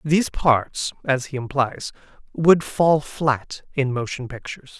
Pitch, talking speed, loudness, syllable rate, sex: 140 Hz, 140 wpm, -21 LUFS, 3.9 syllables/s, male